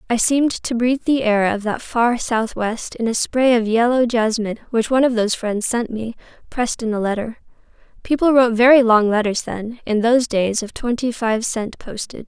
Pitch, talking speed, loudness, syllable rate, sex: 230 Hz, 200 wpm, -18 LUFS, 5.5 syllables/s, female